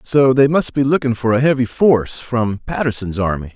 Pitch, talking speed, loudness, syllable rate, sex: 125 Hz, 200 wpm, -16 LUFS, 5.2 syllables/s, male